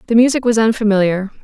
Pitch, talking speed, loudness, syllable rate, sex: 220 Hz, 165 wpm, -14 LUFS, 6.8 syllables/s, female